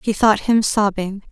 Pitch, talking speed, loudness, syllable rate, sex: 205 Hz, 185 wpm, -17 LUFS, 4.4 syllables/s, female